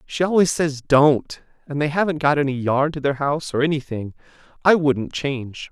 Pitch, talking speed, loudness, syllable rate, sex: 145 Hz, 190 wpm, -20 LUFS, 5.2 syllables/s, male